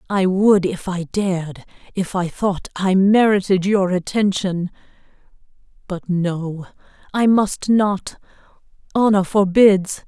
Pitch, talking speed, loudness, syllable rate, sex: 190 Hz, 100 wpm, -18 LUFS, 3.7 syllables/s, female